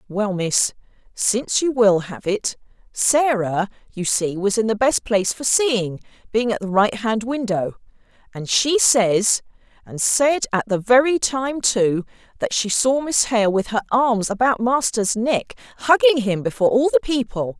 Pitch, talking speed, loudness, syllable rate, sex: 225 Hz, 165 wpm, -19 LUFS, 4.3 syllables/s, female